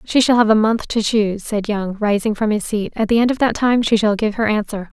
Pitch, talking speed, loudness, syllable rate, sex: 215 Hz, 290 wpm, -17 LUFS, 5.7 syllables/s, female